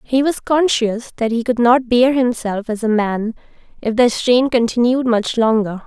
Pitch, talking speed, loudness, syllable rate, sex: 235 Hz, 185 wpm, -16 LUFS, 4.4 syllables/s, female